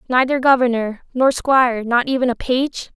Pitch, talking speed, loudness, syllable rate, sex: 250 Hz, 160 wpm, -17 LUFS, 4.9 syllables/s, female